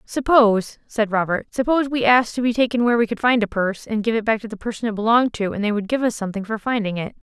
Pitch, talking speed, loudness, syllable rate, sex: 225 Hz, 270 wpm, -20 LUFS, 7.0 syllables/s, female